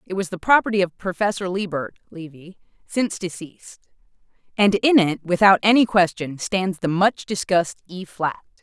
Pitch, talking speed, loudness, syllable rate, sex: 185 Hz, 155 wpm, -20 LUFS, 5.4 syllables/s, female